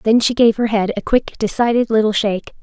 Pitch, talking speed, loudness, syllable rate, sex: 220 Hz, 230 wpm, -16 LUFS, 5.7 syllables/s, female